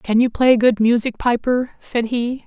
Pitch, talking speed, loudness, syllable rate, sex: 235 Hz, 195 wpm, -18 LUFS, 4.2 syllables/s, female